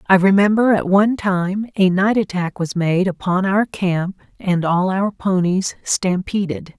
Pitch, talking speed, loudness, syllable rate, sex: 190 Hz, 160 wpm, -18 LUFS, 4.2 syllables/s, female